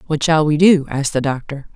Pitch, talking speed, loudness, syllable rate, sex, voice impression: 150 Hz, 240 wpm, -16 LUFS, 6.0 syllables/s, female, feminine, very adult-like, cool, calm, elegant, slightly sweet